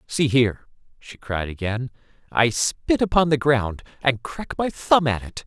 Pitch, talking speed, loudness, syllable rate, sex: 130 Hz, 165 wpm, -22 LUFS, 4.4 syllables/s, male